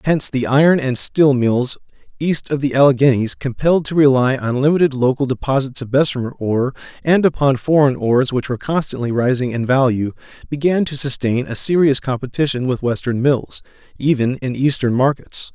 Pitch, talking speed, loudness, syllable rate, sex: 135 Hz, 160 wpm, -17 LUFS, 5.4 syllables/s, male